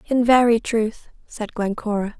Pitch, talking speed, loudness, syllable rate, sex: 225 Hz, 135 wpm, -20 LUFS, 4.3 syllables/s, female